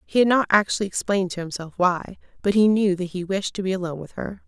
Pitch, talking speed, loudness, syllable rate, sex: 190 Hz, 255 wpm, -22 LUFS, 6.5 syllables/s, female